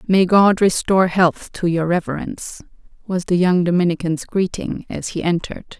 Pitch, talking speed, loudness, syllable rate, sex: 180 Hz, 155 wpm, -18 LUFS, 5.1 syllables/s, female